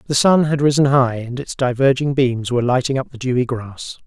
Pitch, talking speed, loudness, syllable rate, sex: 130 Hz, 220 wpm, -17 LUFS, 5.5 syllables/s, male